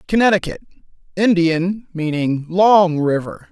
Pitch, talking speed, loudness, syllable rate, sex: 175 Hz, 70 wpm, -17 LUFS, 4.0 syllables/s, male